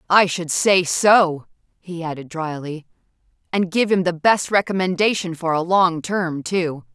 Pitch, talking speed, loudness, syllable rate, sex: 175 Hz, 155 wpm, -19 LUFS, 4.2 syllables/s, female